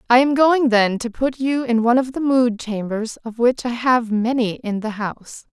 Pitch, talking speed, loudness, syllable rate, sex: 240 Hz, 225 wpm, -19 LUFS, 4.8 syllables/s, female